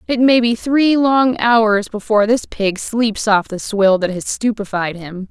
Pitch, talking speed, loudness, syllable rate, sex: 220 Hz, 180 wpm, -16 LUFS, 4.1 syllables/s, female